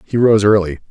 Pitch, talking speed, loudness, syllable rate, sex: 105 Hz, 200 wpm, -13 LUFS, 6.0 syllables/s, male